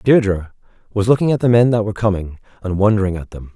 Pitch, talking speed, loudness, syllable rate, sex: 105 Hz, 220 wpm, -17 LUFS, 6.6 syllables/s, male